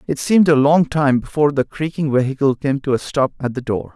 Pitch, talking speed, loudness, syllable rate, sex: 140 Hz, 240 wpm, -17 LUFS, 5.9 syllables/s, male